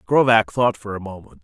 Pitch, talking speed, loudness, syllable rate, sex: 105 Hz, 210 wpm, -19 LUFS, 5.3 syllables/s, male